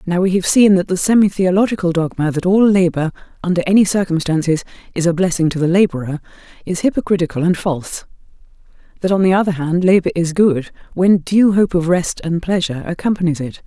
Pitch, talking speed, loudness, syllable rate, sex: 180 Hz, 185 wpm, -16 LUFS, 6.0 syllables/s, female